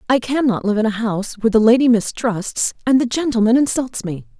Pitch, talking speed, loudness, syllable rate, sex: 230 Hz, 220 wpm, -17 LUFS, 5.8 syllables/s, female